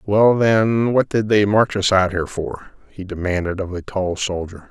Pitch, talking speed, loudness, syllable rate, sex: 100 Hz, 205 wpm, -18 LUFS, 4.5 syllables/s, male